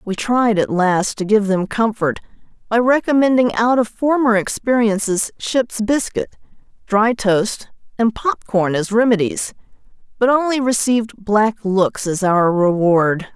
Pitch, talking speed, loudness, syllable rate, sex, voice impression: 215 Hz, 140 wpm, -17 LUFS, 4.1 syllables/s, female, feminine, adult-like, tensed, powerful, bright, clear, intellectual, friendly, slightly reassuring, elegant, lively, slightly kind